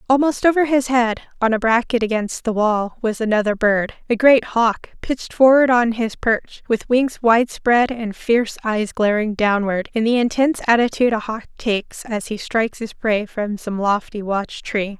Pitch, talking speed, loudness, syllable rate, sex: 225 Hz, 190 wpm, -19 LUFS, 4.7 syllables/s, female